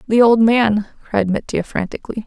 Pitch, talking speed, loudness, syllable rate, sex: 220 Hz, 160 wpm, -17 LUFS, 5.1 syllables/s, female